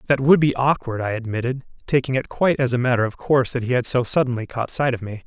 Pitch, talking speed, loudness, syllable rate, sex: 125 Hz, 260 wpm, -21 LUFS, 6.6 syllables/s, male